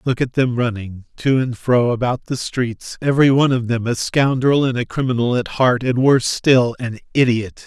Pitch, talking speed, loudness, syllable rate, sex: 125 Hz, 205 wpm, -18 LUFS, 4.9 syllables/s, male